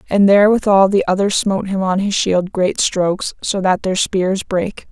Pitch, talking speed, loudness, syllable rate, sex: 190 Hz, 195 wpm, -16 LUFS, 5.0 syllables/s, female